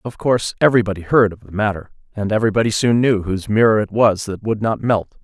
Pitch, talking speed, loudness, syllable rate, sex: 105 Hz, 220 wpm, -17 LUFS, 6.5 syllables/s, male